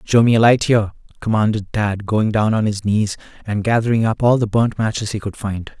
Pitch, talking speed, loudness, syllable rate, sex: 110 Hz, 230 wpm, -18 LUFS, 5.4 syllables/s, male